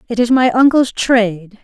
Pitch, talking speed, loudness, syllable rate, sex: 235 Hz, 185 wpm, -13 LUFS, 4.9 syllables/s, female